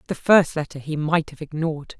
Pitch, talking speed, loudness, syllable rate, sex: 155 Hz, 210 wpm, -21 LUFS, 5.6 syllables/s, female